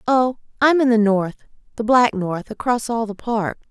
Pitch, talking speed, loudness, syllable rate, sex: 225 Hz, 180 wpm, -19 LUFS, 4.7 syllables/s, female